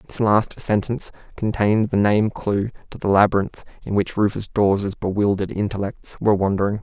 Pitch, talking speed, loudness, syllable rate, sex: 100 Hz, 160 wpm, -21 LUFS, 5.5 syllables/s, male